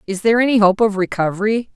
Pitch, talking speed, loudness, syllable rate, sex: 210 Hz, 205 wpm, -16 LUFS, 7.0 syllables/s, female